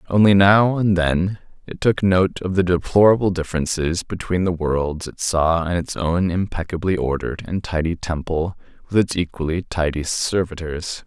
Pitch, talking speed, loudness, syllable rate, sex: 90 Hz, 155 wpm, -20 LUFS, 4.8 syllables/s, male